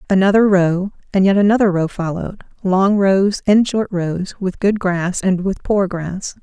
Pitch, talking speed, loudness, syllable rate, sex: 190 Hz, 170 wpm, -16 LUFS, 4.4 syllables/s, female